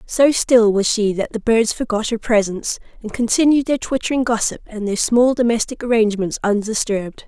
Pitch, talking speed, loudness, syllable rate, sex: 225 Hz, 175 wpm, -18 LUFS, 5.4 syllables/s, female